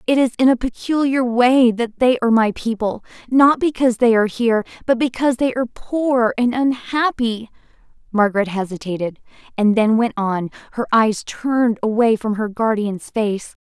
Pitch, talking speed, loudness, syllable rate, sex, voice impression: 235 Hz, 160 wpm, -18 LUFS, 5.1 syllables/s, female, feminine, adult-like, tensed, powerful, bright, clear, intellectual, friendly, elegant, lively, slightly sharp